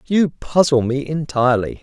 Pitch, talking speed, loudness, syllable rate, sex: 145 Hz, 130 wpm, -18 LUFS, 4.6 syllables/s, male